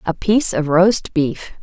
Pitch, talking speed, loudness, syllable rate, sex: 180 Hz, 185 wpm, -16 LUFS, 4.3 syllables/s, female